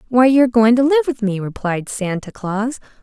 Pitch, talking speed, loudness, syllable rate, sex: 225 Hz, 220 wpm, -17 LUFS, 5.6 syllables/s, female